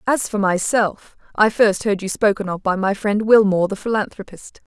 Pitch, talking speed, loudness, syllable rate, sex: 205 Hz, 190 wpm, -18 LUFS, 5.1 syllables/s, female